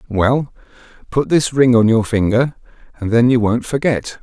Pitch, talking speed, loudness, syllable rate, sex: 120 Hz, 170 wpm, -15 LUFS, 4.6 syllables/s, male